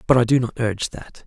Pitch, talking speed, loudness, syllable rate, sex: 120 Hz, 285 wpm, -21 LUFS, 6.2 syllables/s, male